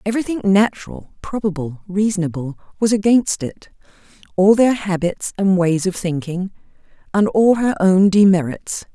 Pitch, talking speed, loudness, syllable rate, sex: 195 Hz, 130 wpm, -17 LUFS, 4.8 syllables/s, female